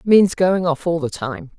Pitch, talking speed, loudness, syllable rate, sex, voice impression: 165 Hz, 225 wpm, -18 LUFS, 4.2 syllables/s, female, feminine, adult-like, slightly fluent, sincere, slightly calm, slightly reassuring, slightly kind